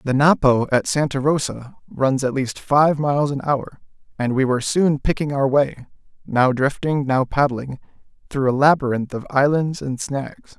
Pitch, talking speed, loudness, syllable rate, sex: 140 Hz, 160 wpm, -19 LUFS, 4.6 syllables/s, male